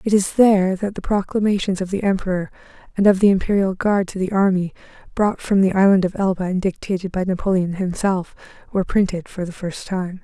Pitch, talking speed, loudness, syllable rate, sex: 190 Hz, 200 wpm, -19 LUFS, 5.8 syllables/s, female